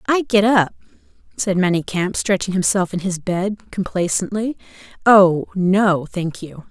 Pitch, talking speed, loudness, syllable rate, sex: 190 Hz, 135 wpm, -18 LUFS, 4.2 syllables/s, female